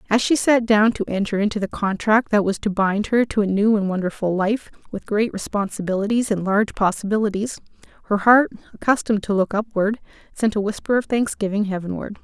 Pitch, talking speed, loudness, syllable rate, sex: 210 Hz, 185 wpm, -20 LUFS, 5.8 syllables/s, female